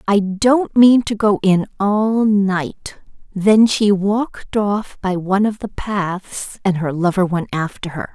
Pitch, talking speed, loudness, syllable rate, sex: 200 Hz, 170 wpm, -17 LUFS, 3.6 syllables/s, female